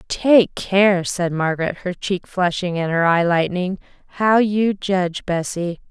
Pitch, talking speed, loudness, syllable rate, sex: 185 Hz, 150 wpm, -19 LUFS, 4.2 syllables/s, female